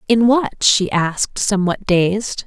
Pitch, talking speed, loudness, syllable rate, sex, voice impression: 200 Hz, 145 wpm, -16 LUFS, 3.9 syllables/s, female, very feminine, slightly young, slightly adult-like, thin, tensed, slightly powerful, bright, very hard, very clear, fluent, cute, slightly cool, intellectual, very refreshing, slightly sincere, slightly calm, friendly, reassuring, unique, slightly elegant, wild, slightly sweet, very lively, strict, intense, slightly light